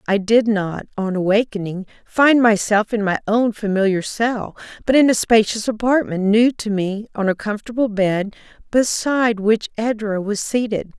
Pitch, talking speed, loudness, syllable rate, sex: 215 Hz, 160 wpm, -18 LUFS, 4.7 syllables/s, female